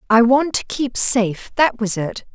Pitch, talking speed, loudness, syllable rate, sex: 235 Hz, 205 wpm, -18 LUFS, 4.5 syllables/s, female